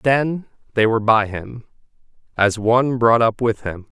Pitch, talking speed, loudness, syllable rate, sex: 115 Hz, 165 wpm, -18 LUFS, 4.4 syllables/s, male